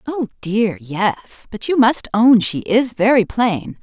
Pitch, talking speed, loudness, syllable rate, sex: 225 Hz, 170 wpm, -17 LUFS, 3.5 syllables/s, female